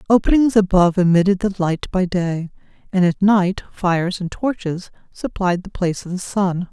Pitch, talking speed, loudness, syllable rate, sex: 185 Hz, 170 wpm, -18 LUFS, 5.0 syllables/s, female